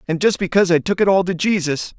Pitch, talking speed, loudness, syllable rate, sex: 180 Hz, 270 wpm, -17 LUFS, 6.6 syllables/s, male